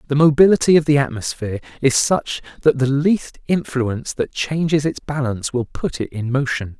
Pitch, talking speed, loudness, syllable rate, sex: 140 Hz, 175 wpm, -19 LUFS, 5.2 syllables/s, male